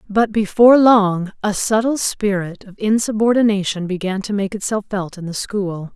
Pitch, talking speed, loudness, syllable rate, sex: 205 Hz, 160 wpm, -17 LUFS, 4.8 syllables/s, female